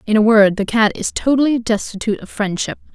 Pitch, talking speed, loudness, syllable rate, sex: 220 Hz, 205 wpm, -16 LUFS, 6.0 syllables/s, female